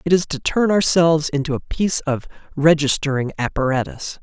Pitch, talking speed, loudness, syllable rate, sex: 155 Hz, 155 wpm, -19 LUFS, 5.6 syllables/s, male